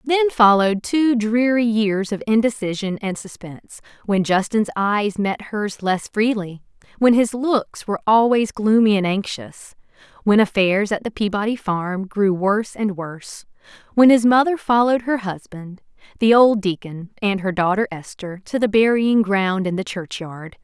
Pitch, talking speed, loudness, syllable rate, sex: 210 Hz, 155 wpm, -19 LUFS, 4.5 syllables/s, female